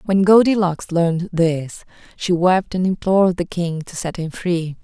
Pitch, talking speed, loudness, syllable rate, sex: 175 Hz, 175 wpm, -18 LUFS, 4.5 syllables/s, female